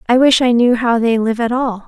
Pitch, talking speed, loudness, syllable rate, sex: 240 Hz, 290 wpm, -14 LUFS, 5.4 syllables/s, female